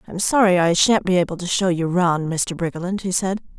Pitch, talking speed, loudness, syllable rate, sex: 180 Hz, 235 wpm, -19 LUFS, 5.5 syllables/s, female